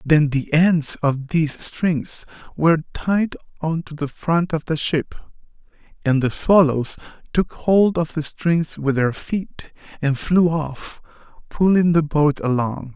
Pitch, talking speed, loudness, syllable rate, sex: 155 Hz, 155 wpm, -20 LUFS, 3.7 syllables/s, male